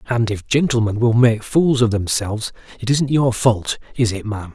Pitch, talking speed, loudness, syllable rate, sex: 115 Hz, 200 wpm, -18 LUFS, 5.2 syllables/s, male